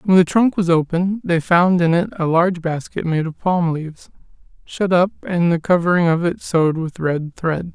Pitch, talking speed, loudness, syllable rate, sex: 170 Hz, 210 wpm, -18 LUFS, 5.1 syllables/s, male